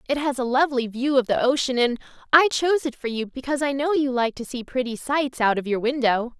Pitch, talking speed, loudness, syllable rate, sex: 260 Hz, 255 wpm, -22 LUFS, 6.0 syllables/s, female